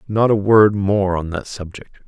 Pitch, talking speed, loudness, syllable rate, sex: 100 Hz, 205 wpm, -16 LUFS, 4.4 syllables/s, male